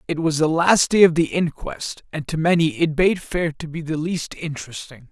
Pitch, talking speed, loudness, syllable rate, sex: 160 Hz, 225 wpm, -20 LUFS, 4.9 syllables/s, male